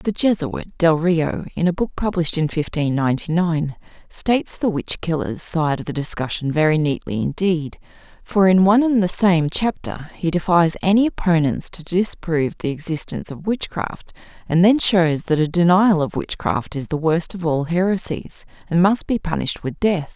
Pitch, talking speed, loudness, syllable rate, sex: 170 Hz, 175 wpm, -19 LUFS, 4.9 syllables/s, female